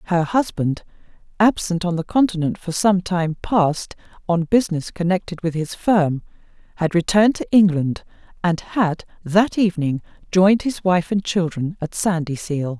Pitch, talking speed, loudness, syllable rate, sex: 180 Hz, 145 wpm, -20 LUFS, 4.7 syllables/s, female